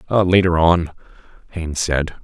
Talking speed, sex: 105 wpm, male